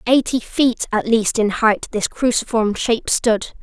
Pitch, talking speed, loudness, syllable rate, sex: 230 Hz, 165 wpm, -18 LUFS, 4.2 syllables/s, female